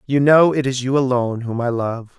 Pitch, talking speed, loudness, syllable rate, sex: 130 Hz, 245 wpm, -18 LUFS, 5.4 syllables/s, male